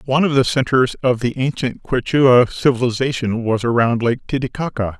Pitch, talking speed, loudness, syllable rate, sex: 125 Hz, 155 wpm, -17 LUFS, 5.6 syllables/s, male